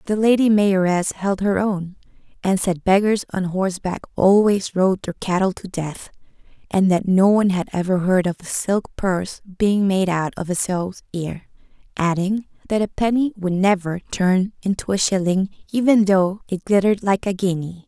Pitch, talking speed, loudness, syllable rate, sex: 190 Hz, 175 wpm, -20 LUFS, 4.8 syllables/s, female